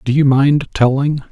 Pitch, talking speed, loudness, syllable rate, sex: 135 Hz, 185 wpm, -14 LUFS, 4.4 syllables/s, male